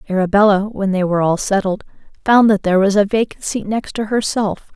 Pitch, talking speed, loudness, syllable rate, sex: 200 Hz, 190 wpm, -16 LUFS, 5.5 syllables/s, female